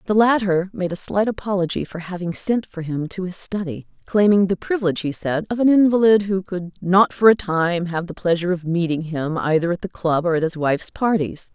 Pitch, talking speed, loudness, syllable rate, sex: 185 Hz, 220 wpm, -20 LUFS, 5.5 syllables/s, female